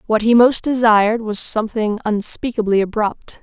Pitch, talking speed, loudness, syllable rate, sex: 220 Hz, 140 wpm, -16 LUFS, 5.0 syllables/s, female